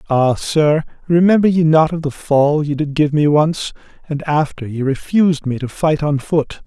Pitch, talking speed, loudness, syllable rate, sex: 150 Hz, 200 wpm, -16 LUFS, 4.6 syllables/s, male